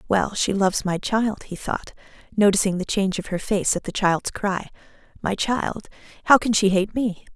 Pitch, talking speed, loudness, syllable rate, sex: 200 Hz, 195 wpm, -22 LUFS, 5.0 syllables/s, female